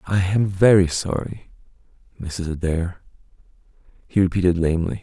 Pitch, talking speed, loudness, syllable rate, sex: 90 Hz, 105 wpm, -20 LUFS, 5.0 syllables/s, male